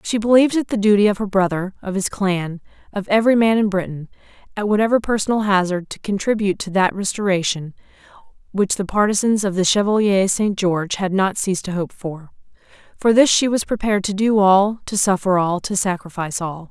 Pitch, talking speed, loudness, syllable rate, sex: 200 Hz, 190 wpm, -18 LUFS, 5.8 syllables/s, female